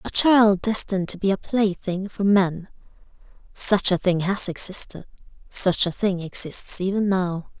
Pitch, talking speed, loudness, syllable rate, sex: 190 Hz, 150 wpm, -21 LUFS, 4.4 syllables/s, female